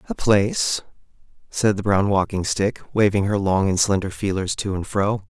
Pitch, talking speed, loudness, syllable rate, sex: 100 Hz, 180 wpm, -21 LUFS, 4.8 syllables/s, male